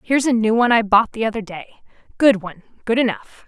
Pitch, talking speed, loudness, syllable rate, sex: 225 Hz, 190 wpm, -18 LUFS, 6.6 syllables/s, female